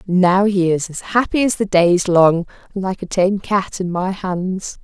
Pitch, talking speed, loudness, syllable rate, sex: 185 Hz, 225 wpm, -17 LUFS, 4.3 syllables/s, female